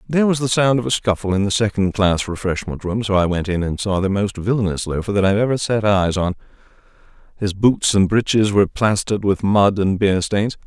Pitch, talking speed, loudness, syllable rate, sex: 100 Hz, 225 wpm, -18 LUFS, 5.6 syllables/s, male